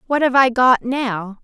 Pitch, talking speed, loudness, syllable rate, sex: 245 Hz, 210 wpm, -16 LUFS, 3.9 syllables/s, female